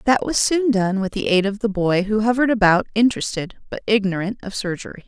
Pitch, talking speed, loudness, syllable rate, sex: 210 Hz, 215 wpm, -19 LUFS, 5.9 syllables/s, female